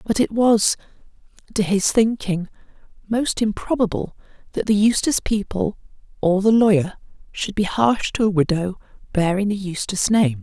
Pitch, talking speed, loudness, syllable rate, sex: 200 Hz, 145 wpm, -20 LUFS, 4.9 syllables/s, female